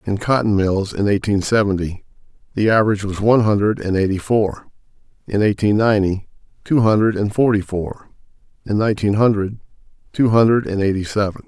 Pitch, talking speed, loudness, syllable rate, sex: 105 Hz, 155 wpm, -18 LUFS, 5.8 syllables/s, male